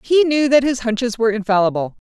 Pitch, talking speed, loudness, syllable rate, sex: 240 Hz, 200 wpm, -17 LUFS, 6.4 syllables/s, female